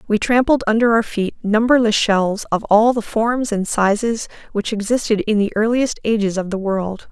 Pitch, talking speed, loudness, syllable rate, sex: 215 Hz, 185 wpm, -18 LUFS, 4.8 syllables/s, female